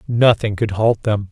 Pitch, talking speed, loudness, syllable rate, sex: 105 Hz, 185 wpm, -17 LUFS, 4.3 syllables/s, male